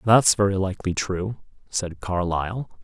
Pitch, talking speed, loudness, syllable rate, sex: 95 Hz, 125 wpm, -24 LUFS, 4.7 syllables/s, male